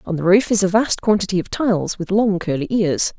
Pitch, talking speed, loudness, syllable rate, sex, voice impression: 195 Hz, 245 wpm, -18 LUFS, 5.6 syllables/s, female, very feminine, very adult-like, slightly thin, slightly tensed, slightly powerful, bright, hard, very clear, very fluent, cool, very intellectual, very refreshing, slightly sincere, slightly calm, slightly friendly, slightly reassuring, unique, slightly elegant, wild, sweet, very lively, strict, very intense